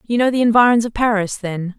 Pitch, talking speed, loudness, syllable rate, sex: 220 Hz, 235 wpm, -16 LUFS, 5.9 syllables/s, female